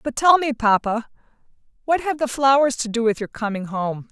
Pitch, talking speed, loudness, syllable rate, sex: 245 Hz, 205 wpm, -20 LUFS, 5.2 syllables/s, female